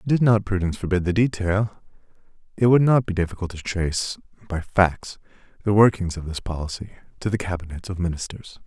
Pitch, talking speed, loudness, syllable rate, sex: 95 Hz, 175 wpm, -23 LUFS, 5.8 syllables/s, male